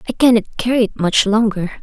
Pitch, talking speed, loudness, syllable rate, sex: 215 Hz, 200 wpm, -15 LUFS, 6.3 syllables/s, female